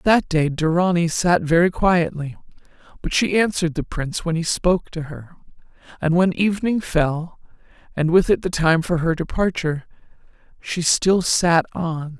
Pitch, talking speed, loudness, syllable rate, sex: 170 Hz, 155 wpm, -20 LUFS, 4.7 syllables/s, female